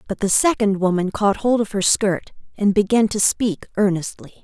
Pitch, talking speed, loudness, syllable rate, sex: 200 Hz, 190 wpm, -19 LUFS, 4.9 syllables/s, female